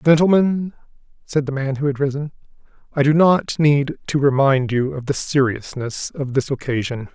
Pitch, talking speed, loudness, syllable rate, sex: 140 Hz, 170 wpm, -19 LUFS, 4.8 syllables/s, male